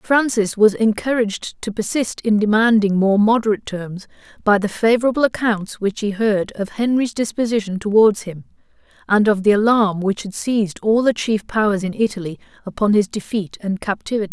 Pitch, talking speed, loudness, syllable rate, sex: 210 Hz, 170 wpm, -18 LUFS, 5.3 syllables/s, female